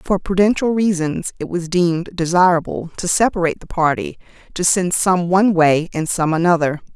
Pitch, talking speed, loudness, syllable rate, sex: 175 Hz, 165 wpm, -17 LUFS, 5.3 syllables/s, female